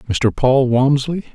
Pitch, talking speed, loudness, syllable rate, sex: 130 Hz, 135 wpm, -16 LUFS, 3.9 syllables/s, male